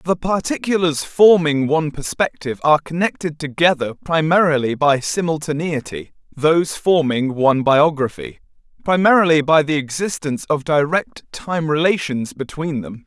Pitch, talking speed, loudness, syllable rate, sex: 155 Hz, 115 wpm, -18 LUFS, 5.0 syllables/s, male